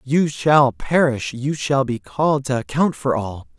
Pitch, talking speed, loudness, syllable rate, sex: 135 Hz, 165 wpm, -19 LUFS, 4.1 syllables/s, male